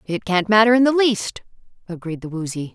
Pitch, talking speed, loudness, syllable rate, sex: 200 Hz, 195 wpm, -18 LUFS, 5.4 syllables/s, female